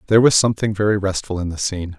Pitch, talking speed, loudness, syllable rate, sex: 100 Hz, 240 wpm, -18 LUFS, 7.8 syllables/s, male